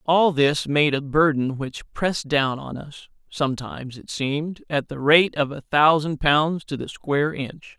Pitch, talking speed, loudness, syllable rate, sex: 150 Hz, 185 wpm, -22 LUFS, 4.4 syllables/s, male